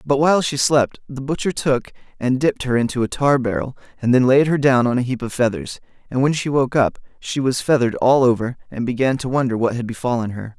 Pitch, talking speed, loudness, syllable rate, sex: 125 Hz, 240 wpm, -19 LUFS, 6.0 syllables/s, male